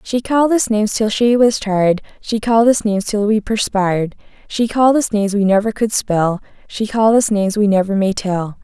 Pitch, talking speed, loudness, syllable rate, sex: 210 Hz, 215 wpm, -16 LUFS, 5.7 syllables/s, female